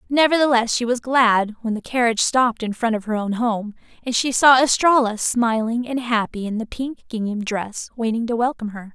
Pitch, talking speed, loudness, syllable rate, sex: 235 Hz, 200 wpm, -20 LUFS, 5.3 syllables/s, female